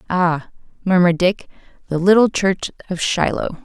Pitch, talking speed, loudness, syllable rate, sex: 180 Hz, 130 wpm, -18 LUFS, 5.1 syllables/s, female